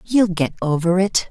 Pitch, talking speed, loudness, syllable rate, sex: 180 Hz, 185 wpm, -19 LUFS, 4.5 syllables/s, female